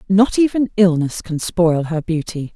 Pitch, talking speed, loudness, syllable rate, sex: 180 Hz, 165 wpm, -17 LUFS, 4.3 syllables/s, female